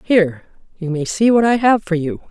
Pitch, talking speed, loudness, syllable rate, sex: 190 Hz, 235 wpm, -16 LUFS, 5.6 syllables/s, female